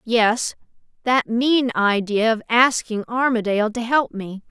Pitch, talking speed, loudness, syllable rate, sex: 230 Hz, 135 wpm, -20 LUFS, 4.0 syllables/s, female